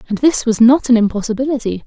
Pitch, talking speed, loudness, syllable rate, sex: 240 Hz, 195 wpm, -14 LUFS, 6.5 syllables/s, female